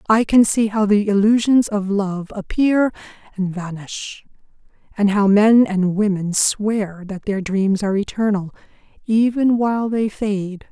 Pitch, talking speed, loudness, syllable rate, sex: 205 Hz, 145 wpm, -18 LUFS, 4.1 syllables/s, female